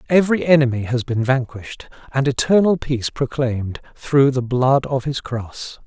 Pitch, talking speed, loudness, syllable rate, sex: 130 Hz, 155 wpm, -19 LUFS, 4.9 syllables/s, male